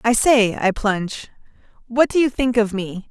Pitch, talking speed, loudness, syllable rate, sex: 225 Hz, 195 wpm, -19 LUFS, 4.6 syllables/s, female